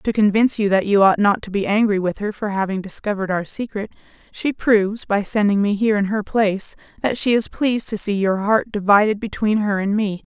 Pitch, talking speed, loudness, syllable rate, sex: 205 Hz, 225 wpm, -19 LUFS, 5.7 syllables/s, female